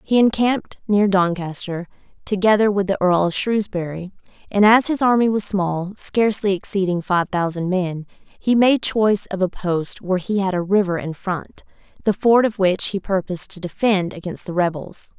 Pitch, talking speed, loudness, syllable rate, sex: 195 Hz, 180 wpm, -19 LUFS, 4.9 syllables/s, female